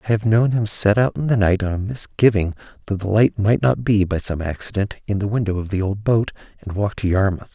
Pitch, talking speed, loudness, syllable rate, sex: 105 Hz, 255 wpm, -20 LUFS, 5.6 syllables/s, male